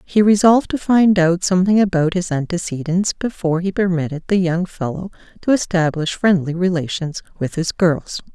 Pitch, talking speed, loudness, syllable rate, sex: 180 Hz, 160 wpm, -18 LUFS, 5.2 syllables/s, female